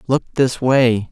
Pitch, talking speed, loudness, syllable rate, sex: 125 Hz, 160 wpm, -16 LUFS, 3.7 syllables/s, male